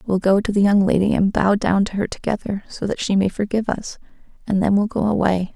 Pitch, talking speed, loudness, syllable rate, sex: 200 Hz, 250 wpm, -19 LUFS, 6.0 syllables/s, female